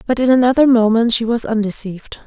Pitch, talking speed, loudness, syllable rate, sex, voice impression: 230 Hz, 185 wpm, -14 LUFS, 6.2 syllables/s, female, feminine, young, thin, relaxed, weak, soft, cute, slightly calm, slightly friendly, elegant, slightly sweet, kind, modest